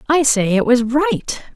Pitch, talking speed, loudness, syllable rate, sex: 245 Hz, 195 wpm, -16 LUFS, 3.9 syllables/s, female